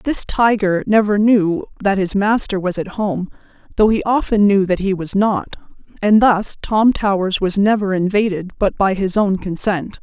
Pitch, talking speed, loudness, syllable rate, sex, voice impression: 200 Hz, 180 wpm, -16 LUFS, 4.4 syllables/s, female, feminine, adult-like, slightly muffled, slightly intellectual